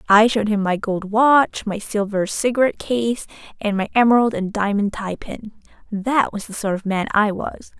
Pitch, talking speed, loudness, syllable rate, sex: 215 Hz, 185 wpm, -19 LUFS, 5.0 syllables/s, female